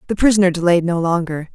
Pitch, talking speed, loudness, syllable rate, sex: 180 Hz, 195 wpm, -16 LUFS, 6.8 syllables/s, female